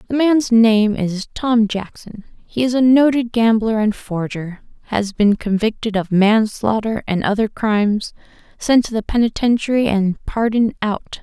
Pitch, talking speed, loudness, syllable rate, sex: 220 Hz, 150 wpm, -17 LUFS, 4.4 syllables/s, female